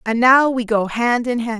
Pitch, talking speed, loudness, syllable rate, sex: 235 Hz, 265 wpm, -16 LUFS, 4.6 syllables/s, female